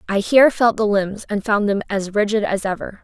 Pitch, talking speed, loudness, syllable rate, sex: 210 Hz, 235 wpm, -18 LUFS, 5.5 syllables/s, female